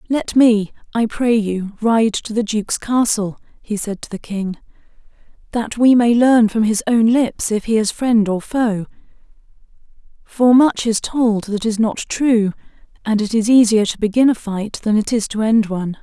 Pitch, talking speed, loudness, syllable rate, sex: 220 Hz, 190 wpm, -17 LUFS, 4.5 syllables/s, female